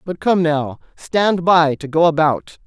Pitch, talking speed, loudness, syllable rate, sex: 160 Hz, 180 wpm, -16 LUFS, 3.8 syllables/s, male